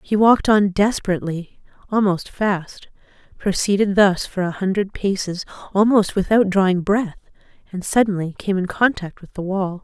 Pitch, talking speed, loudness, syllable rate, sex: 195 Hz, 145 wpm, -19 LUFS, 4.9 syllables/s, female